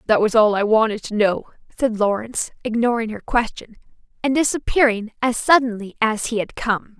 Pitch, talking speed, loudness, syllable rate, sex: 225 Hz, 170 wpm, -20 LUFS, 5.2 syllables/s, female